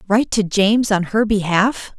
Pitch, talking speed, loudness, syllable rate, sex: 205 Hz, 180 wpm, -17 LUFS, 5.0 syllables/s, female